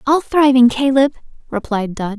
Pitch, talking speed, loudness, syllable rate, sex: 255 Hz, 135 wpm, -15 LUFS, 4.7 syllables/s, female